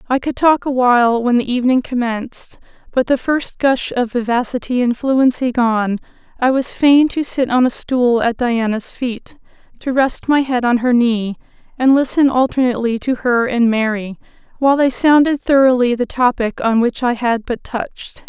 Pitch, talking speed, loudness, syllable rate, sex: 250 Hz, 180 wpm, -16 LUFS, 4.8 syllables/s, female